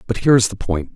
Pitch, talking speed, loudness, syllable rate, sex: 105 Hz, 315 wpm, -17 LUFS, 7.6 syllables/s, male